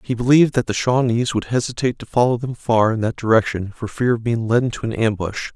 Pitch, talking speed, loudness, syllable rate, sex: 115 Hz, 240 wpm, -19 LUFS, 6.1 syllables/s, male